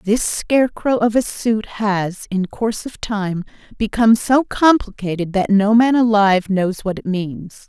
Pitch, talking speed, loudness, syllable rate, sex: 210 Hz, 165 wpm, -17 LUFS, 4.3 syllables/s, female